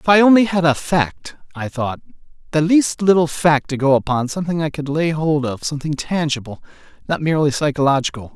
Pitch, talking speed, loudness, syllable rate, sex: 155 Hz, 185 wpm, -18 LUFS, 5.7 syllables/s, male